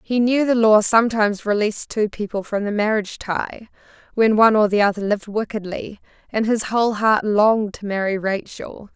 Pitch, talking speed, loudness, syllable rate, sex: 210 Hz, 180 wpm, -19 LUFS, 5.5 syllables/s, female